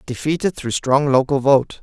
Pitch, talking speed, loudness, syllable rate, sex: 135 Hz, 165 wpm, -18 LUFS, 4.7 syllables/s, male